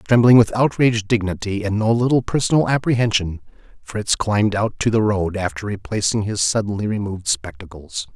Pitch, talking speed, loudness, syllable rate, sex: 105 Hz, 155 wpm, -19 LUFS, 5.5 syllables/s, male